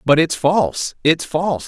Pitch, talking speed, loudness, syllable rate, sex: 155 Hz, 180 wpm, -17 LUFS, 4.5 syllables/s, male